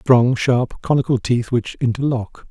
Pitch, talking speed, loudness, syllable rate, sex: 125 Hz, 145 wpm, -19 LUFS, 4.1 syllables/s, male